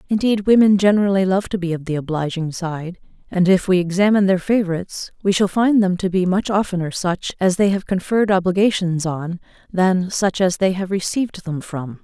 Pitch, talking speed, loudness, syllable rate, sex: 185 Hz, 195 wpm, -18 LUFS, 5.5 syllables/s, female